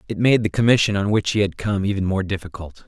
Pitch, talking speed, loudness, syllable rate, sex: 100 Hz, 250 wpm, -20 LUFS, 6.3 syllables/s, male